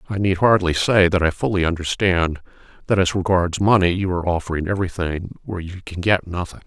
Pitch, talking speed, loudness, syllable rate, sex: 90 Hz, 190 wpm, -20 LUFS, 6.0 syllables/s, male